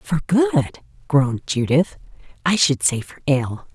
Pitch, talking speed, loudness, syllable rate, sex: 150 Hz, 145 wpm, -20 LUFS, 4.0 syllables/s, female